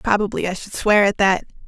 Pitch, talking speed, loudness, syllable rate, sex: 200 Hz, 215 wpm, -19 LUFS, 5.8 syllables/s, female